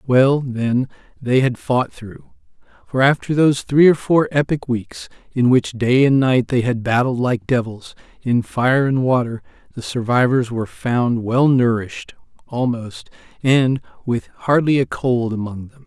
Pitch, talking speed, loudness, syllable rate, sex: 125 Hz, 160 wpm, -18 LUFS, 4.2 syllables/s, male